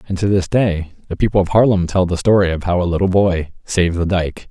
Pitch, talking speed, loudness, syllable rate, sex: 90 Hz, 255 wpm, -16 LUFS, 5.9 syllables/s, male